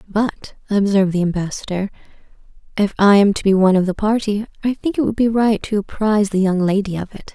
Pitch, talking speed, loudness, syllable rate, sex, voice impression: 205 Hz, 210 wpm, -18 LUFS, 6.0 syllables/s, female, very feminine, young, very thin, tensed, powerful, very bright, soft, very clear, very fluent, slightly raspy, very cute, intellectual, very refreshing, sincere, calm, very friendly, reassuring, very unique, elegant, slightly wild, very sweet, lively, kind, slightly modest, light